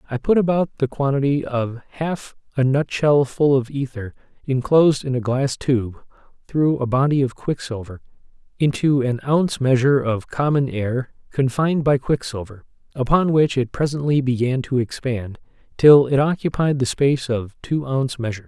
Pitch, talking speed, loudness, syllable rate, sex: 135 Hz, 160 wpm, -20 LUFS, 5.1 syllables/s, male